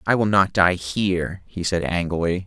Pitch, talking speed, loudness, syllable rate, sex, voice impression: 90 Hz, 195 wpm, -21 LUFS, 4.7 syllables/s, male, masculine, very adult-like, slightly thick, cool, calm, elegant, slightly kind